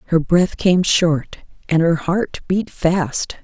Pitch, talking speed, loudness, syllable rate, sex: 170 Hz, 155 wpm, -18 LUFS, 3.3 syllables/s, female